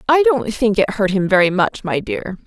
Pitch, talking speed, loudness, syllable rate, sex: 215 Hz, 245 wpm, -17 LUFS, 4.9 syllables/s, female